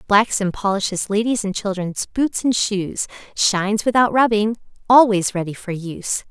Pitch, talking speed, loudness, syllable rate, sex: 205 Hz, 150 wpm, -19 LUFS, 4.7 syllables/s, female